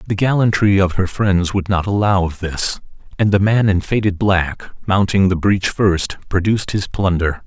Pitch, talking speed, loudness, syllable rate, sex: 95 Hz, 195 wpm, -17 LUFS, 4.8 syllables/s, male